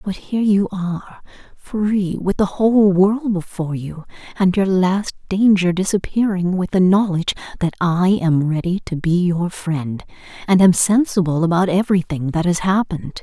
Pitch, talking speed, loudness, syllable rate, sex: 185 Hz, 160 wpm, -18 LUFS, 4.8 syllables/s, female